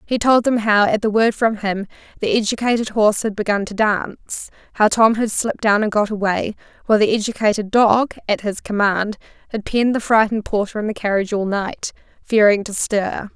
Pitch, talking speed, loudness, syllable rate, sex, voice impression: 215 Hz, 200 wpm, -18 LUFS, 5.5 syllables/s, female, feminine, adult-like, tensed, powerful, bright, clear, fluent, intellectual, friendly, reassuring, lively, slightly sharp, light